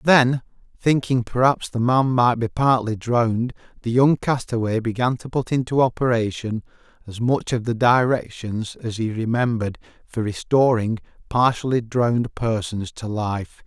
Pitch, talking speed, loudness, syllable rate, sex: 120 Hz, 140 wpm, -21 LUFS, 4.5 syllables/s, male